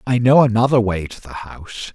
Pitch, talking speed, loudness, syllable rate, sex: 115 Hz, 215 wpm, -15 LUFS, 5.5 syllables/s, male